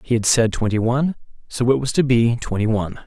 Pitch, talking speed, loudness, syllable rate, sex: 120 Hz, 235 wpm, -19 LUFS, 6.1 syllables/s, male